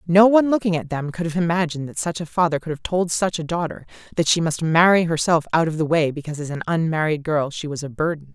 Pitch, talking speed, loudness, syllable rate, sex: 165 Hz, 260 wpm, -21 LUFS, 6.4 syllables/s, female